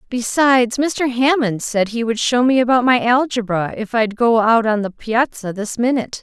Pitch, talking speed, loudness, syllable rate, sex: 235 Hz, 195 wpm, -17 LUFS, 4.8 syllables/s, female